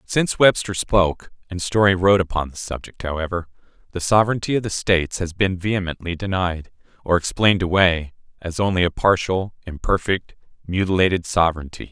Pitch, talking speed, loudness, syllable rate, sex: 90 Hz, 145 wpm, -20 LUFS, 5.8 syllables/s, male